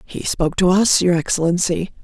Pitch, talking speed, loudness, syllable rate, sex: 175 Hz, 175 wpm, -17 LUFS, 5.4 syllables/s, female